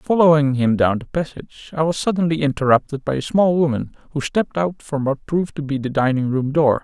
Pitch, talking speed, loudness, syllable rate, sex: 145 Hz, 220 wpm, -19 LUFS, 5.8 syllables/s, male